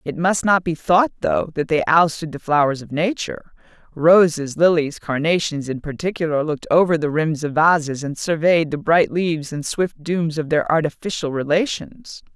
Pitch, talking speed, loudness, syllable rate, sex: 160 Hz, 175 wpm, -19 LUFS, 4.9 syllables/s, female